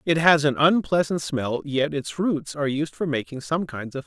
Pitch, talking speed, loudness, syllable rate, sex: 145 Hz, 235 wpm, -23 LUFS, 5.1 syllables/s, male